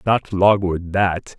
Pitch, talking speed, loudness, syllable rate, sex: 95 Hz, 130 wpm, -18 LUFS, 3.2 syllables/s, male